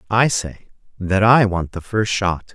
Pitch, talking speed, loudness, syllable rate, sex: 100 Hz, 190 wpm, -18 LUFS, 3.9 syllables/s, male